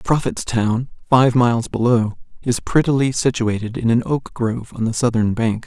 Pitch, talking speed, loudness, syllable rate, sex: 120 Hz, 160 wpm, -19 LUFS, 4.8 syllables/s, male